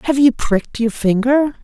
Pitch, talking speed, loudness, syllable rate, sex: 250 Hz, 185 wpm, -16 LUFS, 4.5 syllables/s, female